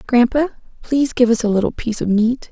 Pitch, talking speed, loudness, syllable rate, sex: 240 Hz, 215 wpm, -17 LUFS, 6.4 syllables/s, female